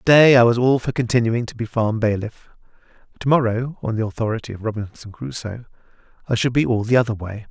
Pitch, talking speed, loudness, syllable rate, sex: 115 Hz, 210 wpm, -20 LUFS, 6.2 syllables/s, male